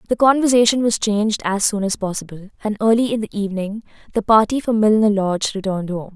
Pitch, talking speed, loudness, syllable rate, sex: 210 Hz, 195 wpm, -18 LUFS, 6.3 syllables/s, female